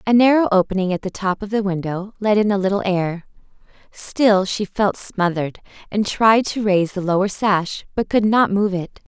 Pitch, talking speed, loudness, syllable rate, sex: 200 Hz, 195 wpm, -19 LUFS, 5.0 syllables/s, female